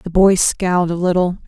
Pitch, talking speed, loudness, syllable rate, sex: 180 Hz, 205 wpm, -16 LUFS, 5.2 syllables/s, female